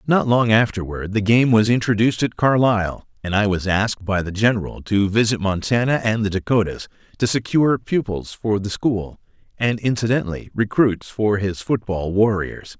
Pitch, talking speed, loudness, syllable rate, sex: 110 Hz, 165 wpm, -20 LUFS, 5.1 syllables/s, male